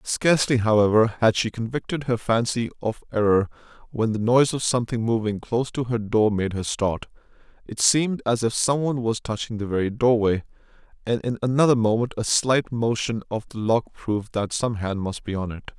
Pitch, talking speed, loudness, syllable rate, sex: 115 Hz, 185 wpm, -23 LUFS, 5.5 syllables/s, male